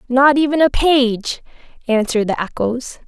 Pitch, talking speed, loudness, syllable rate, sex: 255 Hz, 135 wpm, -16 LUFS, 4.6 syllables/s, female